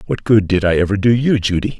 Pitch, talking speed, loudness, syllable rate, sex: 105 Hz, 265 wpm, -15 LUFS, 6.1 syllables/s, male